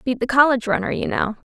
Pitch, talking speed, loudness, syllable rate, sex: 245 Hz, 240 wpm, -19 LUFS, 7.0 syllables/s, female